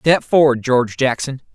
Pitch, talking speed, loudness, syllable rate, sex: 135 Hz, 155 wpm, -16 LUFS, 5.0 syllables/s, male